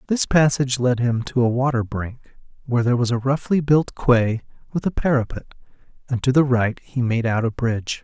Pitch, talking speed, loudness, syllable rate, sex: 125 Hz, 200 wpm, -20 LUFS, 5.8 syllables/s, male